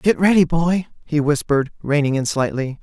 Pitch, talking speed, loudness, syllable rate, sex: 150 Hz, 170 wpm, -19 LUFS, 5.1 syllables/s, male